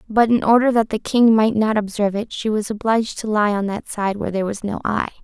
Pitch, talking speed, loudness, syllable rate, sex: 215 Hz, 265 wpm, -19 LUFS, 6.2 syllables/s, female